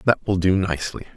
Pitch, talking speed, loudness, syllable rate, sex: 95 Hz, 205 wpm, -22 LUFS, 6.4 syllables/s, male